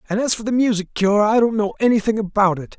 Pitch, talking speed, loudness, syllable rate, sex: 210 Hz, 260 wpm, -18 LUFS, 6.3 syllables/s, male